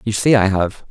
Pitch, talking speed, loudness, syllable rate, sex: 105 Hz, 265 wpm, -16 LUFS, 5.1 syllables/s, male